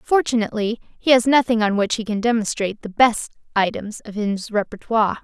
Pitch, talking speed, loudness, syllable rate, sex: 220 Hz, 170 wpm, -20 LUFS, 6.3 syllables/s, female